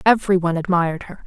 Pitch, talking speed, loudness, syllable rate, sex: 180 Hz, 190 wpm, -19 LUFS, 7.7 syllables/s, female